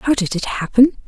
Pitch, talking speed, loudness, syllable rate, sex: 230 Hz, 225 wpm, -17 LUFS, 5.2 syllables/s, female